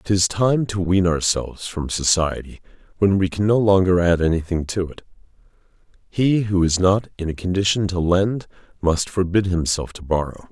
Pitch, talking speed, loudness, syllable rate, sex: 90 Hz, 170 wpm, -20 LUFS, 4.9 syllables/s, male